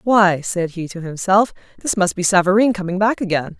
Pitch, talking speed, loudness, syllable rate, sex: 190 Hz, 200 wpm, -18 LUFS, 5.3 syllables/s, female